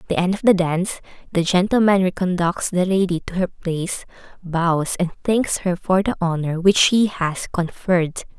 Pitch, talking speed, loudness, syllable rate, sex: 180 Hz, 185 wpm, -20 LUFS, 4.9 syllables/s, female